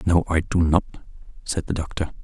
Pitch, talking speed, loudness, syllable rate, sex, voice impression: 85 Hz, 190 wpm, -23 LUFS, 5.1 syllables/s, male, masculine, adult-like, tensed, powerful, hard, slightly muffled, cool, calm, mature, slightly friendly, reassuring, slightly unique, wild, strict